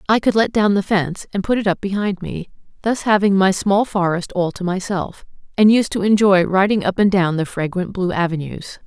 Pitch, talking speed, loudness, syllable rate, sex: 195 Hz, 215 wpm, -18 LUFS, 5.3 syllables/s, female